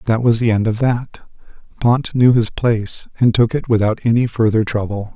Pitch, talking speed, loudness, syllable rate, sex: 115 Hz, 200 wpm, -16 LUFS, 5.0 syllables/s, male